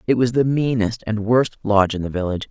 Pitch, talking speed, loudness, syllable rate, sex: 110 Hz, 240 wpm, -19 LUFS, 6.1 syllables/s, female